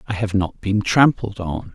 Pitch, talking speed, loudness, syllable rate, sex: 105 Hz, 205 wpm, -20 LUFS, 4.4 syllables/s, male